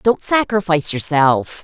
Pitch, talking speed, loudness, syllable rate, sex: 175 Hz, 110 wpm, -16 LUFS, 4.3 syllables/s, female